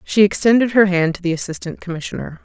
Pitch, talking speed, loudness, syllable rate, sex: 190 Hz, 195 wpm, -17 LUFS, 6.4 syllables/s, female